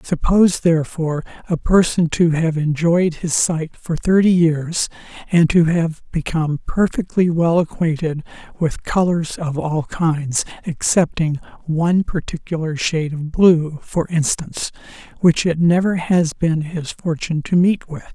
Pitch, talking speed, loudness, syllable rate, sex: 165 Hz, 140 wpm, -18 LUFS, 4.3 syllables/s, male